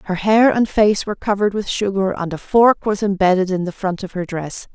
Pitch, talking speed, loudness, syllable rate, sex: 195 Hz, 240 wpm, -18 LUFS, 5.6 syllables/s, female